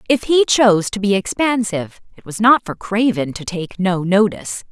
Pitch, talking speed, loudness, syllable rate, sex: 205 Hz, 190 wpm, -17 LUFS, 5.1 syllables/s, female